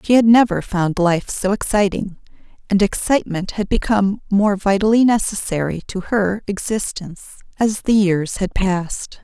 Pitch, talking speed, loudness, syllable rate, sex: 200 Hz, 145 wpm, -18 LUFS, 4.8 syllables/s, female